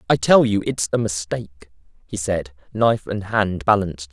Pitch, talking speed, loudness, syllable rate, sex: 95 Hz, 175 wpm, -20 LUFS, 5.0 syllables/s, male